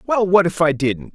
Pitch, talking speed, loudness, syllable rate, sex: 170 Hz, 260 wpm, -17 LUFS, 4.9 syllables/s, male